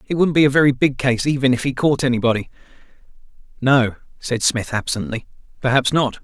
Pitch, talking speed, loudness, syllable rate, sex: 130 Hz, 175 wpm, -18 LUFS, 5.9 syllables/s, male